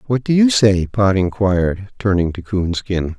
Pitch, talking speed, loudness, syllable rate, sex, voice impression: 100 Hz, 170 wpm, -17 LUFS, 4.4 syllables/s, male, masculine, adult-like, slightly old, slightly thick, relaxed, weak, slightly dark, very soft, muffled, slightly fluent, slightly raspy, slightly cool, intellectual, refreshing, very sincere, very calm, very mature, very friendly, very reassuring, unique, slightly elegant, wild, sweet, very kind, modest, slightly light